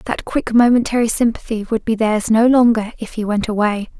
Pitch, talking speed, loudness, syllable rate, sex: 225 Hz, 195 wpm, -16 LUFS, 5.4 syllables/s, female